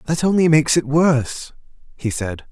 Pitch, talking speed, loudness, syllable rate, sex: 145 Hz, 165 wpm, -18 LUFS, 5.4 syllables/s, male